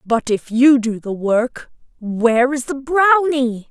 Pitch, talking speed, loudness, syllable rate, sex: 250 Hz, 160 wpm, -16 LUFS, 3.6 syllables/s, female